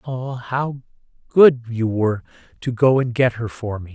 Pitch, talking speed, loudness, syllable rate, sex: 120 Hz, 185 wpm, -19 LUFS, 4.5 syllables/s, male